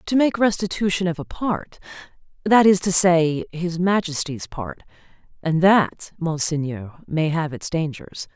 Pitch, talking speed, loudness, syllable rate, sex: 170 Hz, 135 wpm, -21 LUFS, 4.1 syllables/s, female